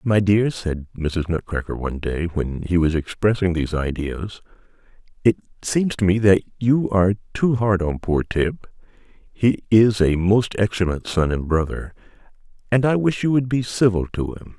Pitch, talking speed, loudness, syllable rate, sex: 100 Hz, 175 wpm, -21 LUFS, 4.7 syllables/s, male